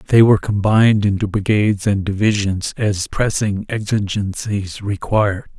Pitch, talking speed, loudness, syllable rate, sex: 105 Hz, 120 wpm, -17 LUFS, 4.7 syllables/s, male